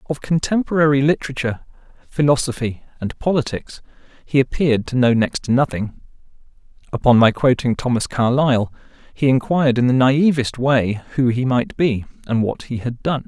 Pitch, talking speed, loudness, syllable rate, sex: 130 Hz, 150 wpm, -18 LUFS, 5.4 syllables/s, male